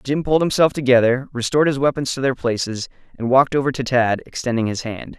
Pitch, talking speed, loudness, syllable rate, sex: 130 Hz, 210 wpm, -19 LUFS, 6.3 syllables/s, male